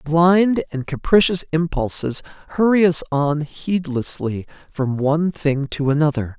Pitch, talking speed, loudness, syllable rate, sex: 155 Hz, 120 wpm, -19 LUFS, 4.1 syllables/s, male